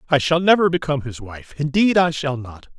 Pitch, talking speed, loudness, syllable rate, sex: 145 Hz, 195 wpm, -18 LUFS, 5.6 syllables/s, male